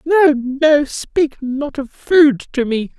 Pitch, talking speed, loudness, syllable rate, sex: 280 Hz, 160 wpm, -16 LUFS, 2.9 syllables/s, female